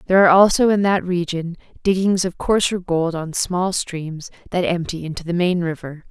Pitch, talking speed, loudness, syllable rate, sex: 175 Hz, 185 wpm, -19 LUFS, 5.1 syllables/s, female